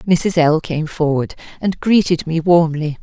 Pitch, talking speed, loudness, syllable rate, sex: 165 Hz, 160 wpm, -16 LUFS, 4.0 syllables/s, female